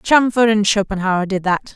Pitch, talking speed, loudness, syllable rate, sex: 205 Hz, 170 wpm, -16 LUFS, 4.7 syllables/s, female